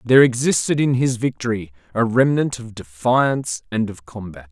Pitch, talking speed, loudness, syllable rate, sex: 115 Hz, 160 wpm, -19 LUFS, 5.1 syllables/s, male